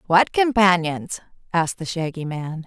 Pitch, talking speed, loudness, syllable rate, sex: 175 Hz, 135 wpm, -21 LUFS, 4.6 syllables/s, female